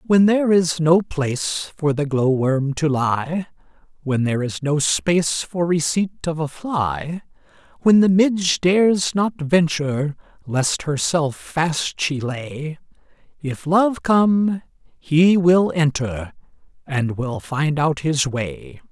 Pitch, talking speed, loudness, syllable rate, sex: 160 Hz, 140 wpm, -19 LUFS, 3.5 syllables/s, male